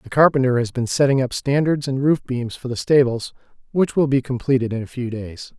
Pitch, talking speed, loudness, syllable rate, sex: 130 Hz, 225 wpm, -20 LUFS, 5.5 syllables/s, male